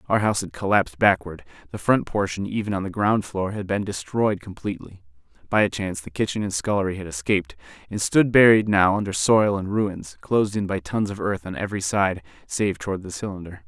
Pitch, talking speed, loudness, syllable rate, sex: 95 Hz, 205 wpm, -23 LUFS, 5.8 syllables/s, male